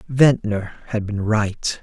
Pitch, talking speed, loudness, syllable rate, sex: 110 Hz, 130 wpm, -20 LUFS, 3.2 syllables/s, male